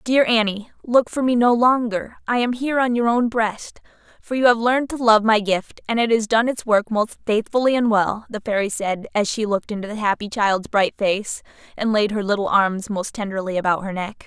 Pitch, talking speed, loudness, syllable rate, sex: 220 Hz, 225 wpm, -20 LUFS, 5.3 syllables/s, female